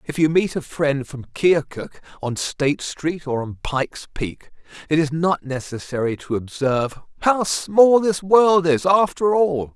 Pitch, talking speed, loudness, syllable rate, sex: 155 Hz, 165 wpm, -20 LUFS, 4.2 syllables/s, male